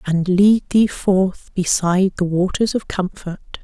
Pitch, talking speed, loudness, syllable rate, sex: 190 Hz, 150 wpm, -18 LUFS, 4.1 syllables/s, female